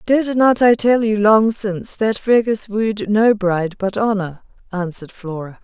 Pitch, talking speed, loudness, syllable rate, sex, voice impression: 210 Hz, 170 wpm, -17 LUFS, 4.4 syllables/s, female, feminine, adult-like, tensed, slightly bright, soft, clear, intellectual, calm, friendly, reassuring, elegant, lively, slightly kind